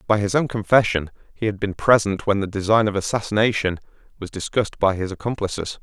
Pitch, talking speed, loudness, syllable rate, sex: 105 Hz, 185 wpm, -21 LUFS, 6.2 syllables/s, male